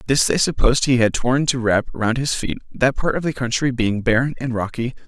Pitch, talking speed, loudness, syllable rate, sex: 125 Hz, 235 wpm, -19 LUFS, 5.5 syllables/s, male